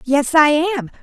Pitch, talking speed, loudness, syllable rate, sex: 295 Hz, 175 wpm, -15 LUFS, 3.6 syllables/s, female